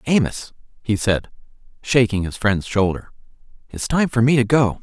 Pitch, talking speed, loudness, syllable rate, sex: 115 Hz, 160 wpm, -19 LUFS, 4.9 syllables/s, male